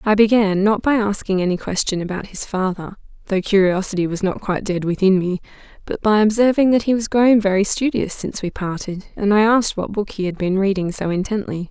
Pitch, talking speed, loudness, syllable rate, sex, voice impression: 200 Hz, 210 wpm, -19 LUFS, 5.8 syllables/s, female, feminine, adult-like, relaxed, slightly powerful, soft, fluent, slightly raspy, intellectual, calm, friendly, reassuring, elegant, lively, slightly modest